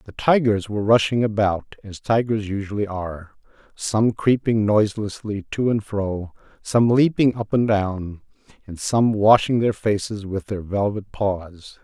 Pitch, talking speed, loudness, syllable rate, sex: 105 Hz, 145 wpm, -21 LUFS, 4.3 syllables/s, male